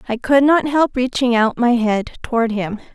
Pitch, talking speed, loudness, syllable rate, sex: 245 Hz, 205 wpm, -17 LUFS, 4.6 syllables/s, female